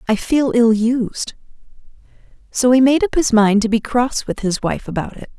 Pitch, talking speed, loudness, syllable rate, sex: 235 Hz, 200 wpm, -17 LUFS, 4.7 syllables/s, female